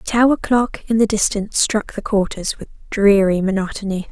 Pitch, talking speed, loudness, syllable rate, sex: 210 Hz, 175 wpm, -18 LUFS, 5.2 syllables/s, female